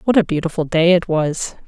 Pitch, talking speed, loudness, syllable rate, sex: 170 Hz, 215 wpm, -17 LUFS, 5.4 syllables/s, female